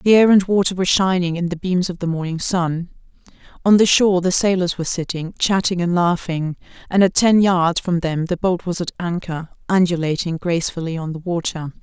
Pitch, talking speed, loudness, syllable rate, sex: 175 Hz, 200 wpm, -18 LUFS, 5.5 syllables/s, female